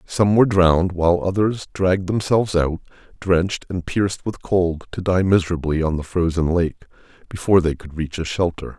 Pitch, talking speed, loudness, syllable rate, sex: 90 Hz, 180 wpm, -20 LUFS, 5.6 syllables/s, male